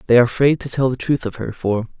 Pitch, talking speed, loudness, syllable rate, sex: 125 Hz, 300 wpm, -19 LUFS, 6.9 syllables/s, male